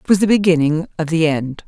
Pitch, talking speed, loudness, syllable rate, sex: 170 Hz, 250 wpm, -16 LUFS, 6.1 syllables/s, female